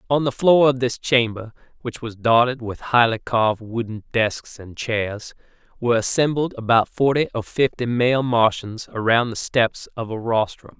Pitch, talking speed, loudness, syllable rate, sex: 120 Hz, 165 wpm, -20 LUFS, 4.6 syllables/s, male